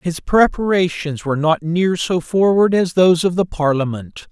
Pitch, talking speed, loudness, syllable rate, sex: 170 Hz, 165 wpm, -16 LUFS, 4.7 syllables/s, male